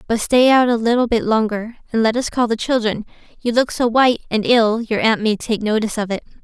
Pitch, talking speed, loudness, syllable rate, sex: 225 Hz, 240 wpm, -17 LUFS, 5.9 syllables/s, female